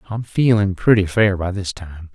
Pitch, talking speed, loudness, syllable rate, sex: 100 Hz, 195 wpm, -18 LUFS, 4.7 syllables/s, male